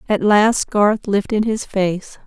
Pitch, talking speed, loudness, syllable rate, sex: 205 Hz, 160 wpm, -17 LUFS, 3.5 syllables/s, female